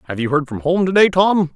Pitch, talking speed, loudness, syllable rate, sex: 165 Hz, 310 wpm, -16 LUFS, 5.8 syllables/s, male